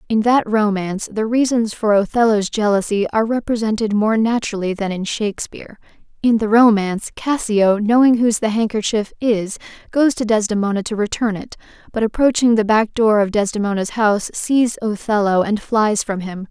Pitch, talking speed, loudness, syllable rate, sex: 215 Hz, 160 wpm, -17 LUFS, 5.4 syllables/s, female